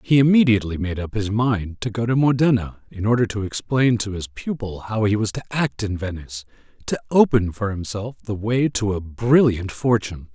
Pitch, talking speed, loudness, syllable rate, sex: 110 Hz, 195 wpm, -21 LUFS, 5.3 syllables/s, male